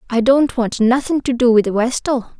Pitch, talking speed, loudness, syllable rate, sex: 245 Hz, 200 wpm, -16 LUFS, 4.7 syllables/s, female